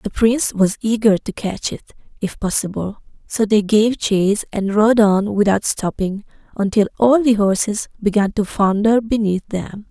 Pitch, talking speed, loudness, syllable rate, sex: 210 Hz, 165 wpm, -17 LUFS, 4.5 syllables/s, female